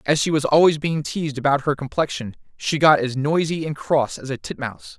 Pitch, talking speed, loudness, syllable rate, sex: 145 Hz, 215 wpm, -21 LUFS, 5.6 syllables/s, male